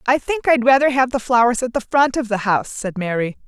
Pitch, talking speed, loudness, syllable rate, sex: 245 Hz, 275 wpm, -18 LUFS, 5.8 syllables/s, female